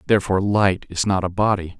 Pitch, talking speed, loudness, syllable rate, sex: 95 Hz, 200 wpm, -20 LUFS, 6.4 syllables/s, male